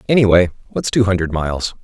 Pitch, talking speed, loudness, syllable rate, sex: 95 Hz, 165 wpm, -16 LUFS, 6.4 syllables/s, male